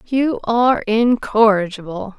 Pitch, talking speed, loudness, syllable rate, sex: 220 Hz, 80 wpm, -16 LUFS, 4.0 syllables/s, female